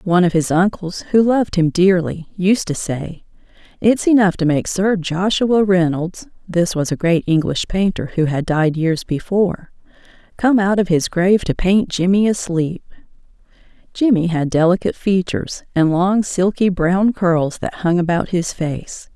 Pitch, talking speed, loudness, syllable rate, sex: 180 Hz, 165 wpm, -17 LUFS, 3.8 syllables/s, female